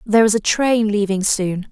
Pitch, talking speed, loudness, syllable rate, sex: 210 Hz, 210 wpm, -17 LUFS, 5.0 syllables/s, female